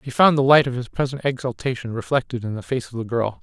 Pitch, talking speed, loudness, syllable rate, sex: 125 Hz, 265 wpm, -21 LUFS, 6.4 syllables/s, male